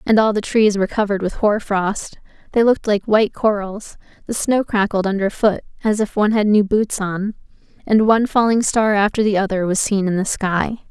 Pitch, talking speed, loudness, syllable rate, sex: 205 Hz, 210 wpm, -18 LUFS, 5.5 syllables/s, female